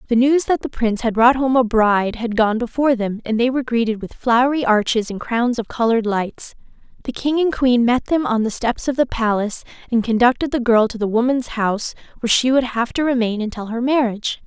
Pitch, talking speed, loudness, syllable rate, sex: 235 Hz, 230 wpm, -18 LUFS, 5.9 syllables/s, female